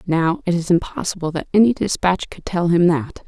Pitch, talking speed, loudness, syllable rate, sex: 175 Hz, 200 wpm, -19 LUFS, 5.5 syllables/s, female